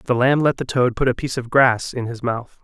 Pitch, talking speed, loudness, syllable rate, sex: 125 Hz, 295 wpm, -19 LUFS, 5.5 syllables/s, male